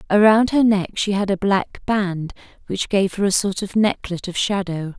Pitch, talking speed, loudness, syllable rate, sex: 195 Hz, 205 wpm, -20 LUFS, 4.6 syllables/s, female